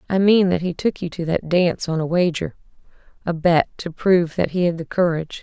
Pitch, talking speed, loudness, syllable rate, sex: 170 Hz, 210 wpm, -20 LUFS, 5.8 syllables/s, female